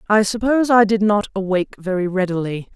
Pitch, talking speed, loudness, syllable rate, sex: 200 Hz, 175 wpm, -18 LUFS, 6.1 syllables/s, female